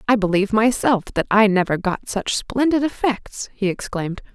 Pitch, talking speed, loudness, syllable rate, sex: 215 Hz, 165 wpm, -20 LUFS, 5.0 syllables/s, female